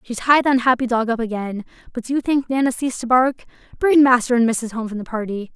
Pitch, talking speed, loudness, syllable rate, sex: 245 Hz, 250 wpm, -19 LUFS, 6.5 syllables/s, female